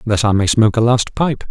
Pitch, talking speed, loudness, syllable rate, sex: 115 Hz, 280 wpm, -15 LUFS, 5.9 syllables/s, male